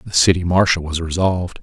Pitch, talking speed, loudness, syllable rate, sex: 85 Hz, 185 wpm, -17 LUFS, 5.7 syllables/s, male